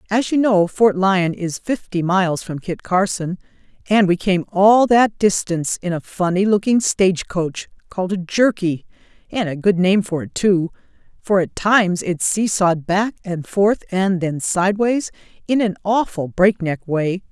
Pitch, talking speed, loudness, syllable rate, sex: 190 Hz, 170 wpm, -18 LUFS, 4.5 syllables/s, female